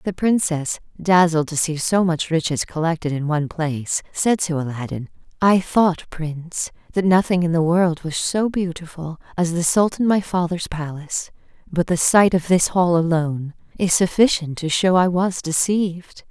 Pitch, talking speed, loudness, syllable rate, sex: 170 Hz, 170 wpm, -20 LUFS, 4.7 syllables/s, female